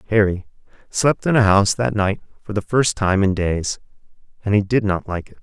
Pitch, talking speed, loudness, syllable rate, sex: 105 Hz, 210 wpm, -19 LUFS, 5.3 syllables/s, male